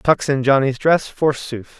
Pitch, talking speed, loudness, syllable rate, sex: 135 Hz, 170 wpm, -17 LUFS, 4.0 syllables/s, male